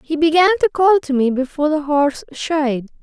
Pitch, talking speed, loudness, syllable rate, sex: 300 Hz, 200 wpm, -16 LUFS, 5.3 syllables/s, female